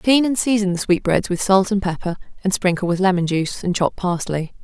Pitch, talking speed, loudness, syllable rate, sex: 190 Hz, 220 wpm, -19 LUFS, 5.9 syllables/s, female